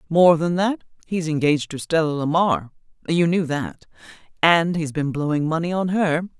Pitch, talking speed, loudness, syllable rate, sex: 160 Hz, 150 wpm, -21 LUFS, 4.9 syllables/s, female